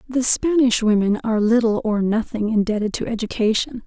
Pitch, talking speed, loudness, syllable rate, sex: 225 Hz, 155 wpm, -19 LUFS, 5.5 syllables/s, female